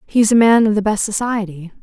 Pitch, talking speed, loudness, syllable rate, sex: 210 Hz, 230 wpm, -15 LUFS, 5.6 syllables/s, female